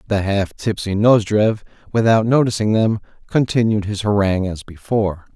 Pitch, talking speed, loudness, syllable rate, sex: 105 Hz, 135 wpm, -18 LUFS, 5.1 syllables/s, male